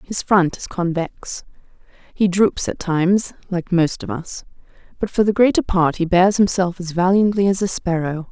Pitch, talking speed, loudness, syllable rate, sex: 185 Hz, 180 wpm, -18 LUFS, 4.7 syllables/s, female